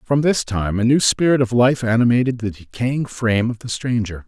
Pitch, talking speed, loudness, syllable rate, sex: 120 Hz, 210 wpm, -18 LUFS, 5.3 syllables/s, male